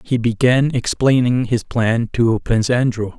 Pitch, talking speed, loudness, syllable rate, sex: 120 Hz, 150 wpm, -17 LUFS, 4.3 syllables/s, male